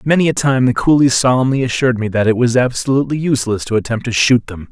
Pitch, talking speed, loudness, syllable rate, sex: 125 Hz, 230 wpm, -14 LUFS, 6.7 syllables/s, male